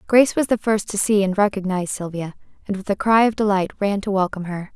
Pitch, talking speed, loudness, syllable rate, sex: 200 Hz, 240 wpm, -20 LUFS, 6.4 syllables/s, female